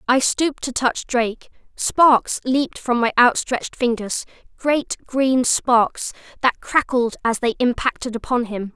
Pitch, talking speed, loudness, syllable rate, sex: 250 Hz, 145 wpm, -20 LUFS, 4.1 syllables/s, female